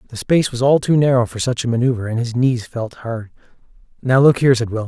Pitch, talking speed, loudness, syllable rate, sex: 125 Hz, 245 wpm, -17 LUFS, 6.5 syllables/s, male